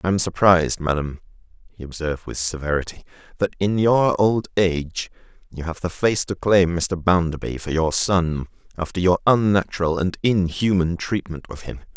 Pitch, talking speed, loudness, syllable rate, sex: 90 Hz, 160 wpm, -21 LUFS, 5.1 syllables/s, male